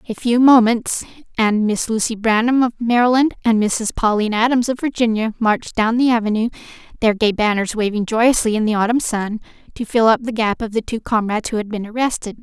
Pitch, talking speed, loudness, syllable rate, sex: 225 Hz, 200 wpm, -17 LUFS, 5.7 syllables/s, female